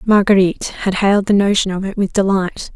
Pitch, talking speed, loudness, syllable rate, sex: 195 Hz, 195 wpm, -15 LUFS, 5.7 syllables/s, female